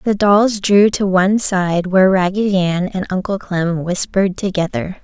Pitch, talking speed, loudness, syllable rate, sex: 190 Hz, 165 wpm, -16 LUFS, 4.7 syllables/s, female